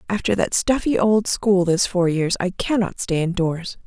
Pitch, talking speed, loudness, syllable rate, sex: 190 Hz, 185 wpm, -20 LUFS, 4.4 syllables/s, female